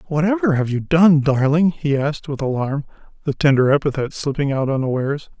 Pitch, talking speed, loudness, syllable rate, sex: 145 Hz, 165 wpm, -18 LUFS, 5.7 syllables/s, male